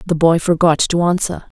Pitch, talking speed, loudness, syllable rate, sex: 170 Hz, 190 wpm, -15 LUFS, 5.0 syllables/s, female